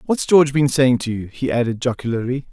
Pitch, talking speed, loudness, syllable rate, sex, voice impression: 125 Hz, 215 wpm, -18 LUFS, 6.0 syllables/s, male, very masculine, slightly middle-aged, thick, tensed, very powerful, bright, slightly soft, very clear, fluent, raspy, cool, slightly intellectual, refreshing, sincere, slightly calm, slightly mature, friendly, slightly reassuring, unique, slightly elegant, wild, slightly sweet, very lively, slightly kind, intense